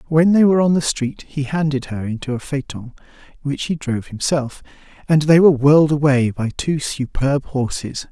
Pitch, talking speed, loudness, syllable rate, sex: 140 Hz, 185 wpm, -18 LUFS, 5.2 syllables/s, male